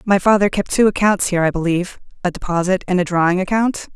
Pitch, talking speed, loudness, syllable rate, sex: 185 Hz, 195 wpm, -17 LUFS, 6.5 syllables/s, female